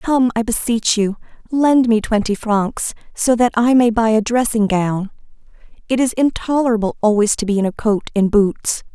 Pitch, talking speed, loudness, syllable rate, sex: 225 Hz, 180 wpm, -17 LUFS, 4.7 syllables/s, female